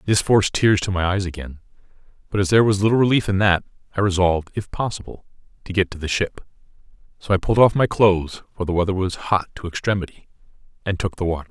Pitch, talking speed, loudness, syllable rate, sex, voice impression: 95 Hz, 205 wpm, -20 LUFS, 6.7 syllables/s, male, very masculine, slightly old, very thick, slightly tensed, very powerful, bright, very soft, very muffled, fluent, raspy, very cool, intellectual, slightly refreshing, sincere, very calm, very mature, very friendly, very reassuring, very unique, elegant, very wild, sweet, lively, very kind